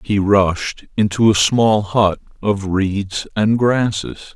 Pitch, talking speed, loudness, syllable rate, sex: 105 Hz, 140 wpm, -17 LUFS, 3.2 syllables/s, male